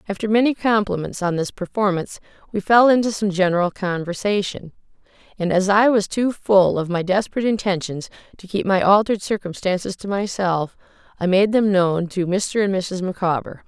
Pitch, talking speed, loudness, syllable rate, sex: 195 Hz, 165 wpm, -20 LUFS, 5.4 syllables/s, female